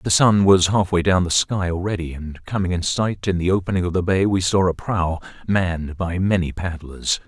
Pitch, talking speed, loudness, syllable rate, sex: 90 Hz, 215 wpm, -20 LUFS, 5.0 syllables/s, male